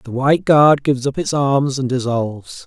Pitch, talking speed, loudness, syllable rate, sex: 135 Hz, 205 wpm, -16 LUFS, 5.1 syllables/s, male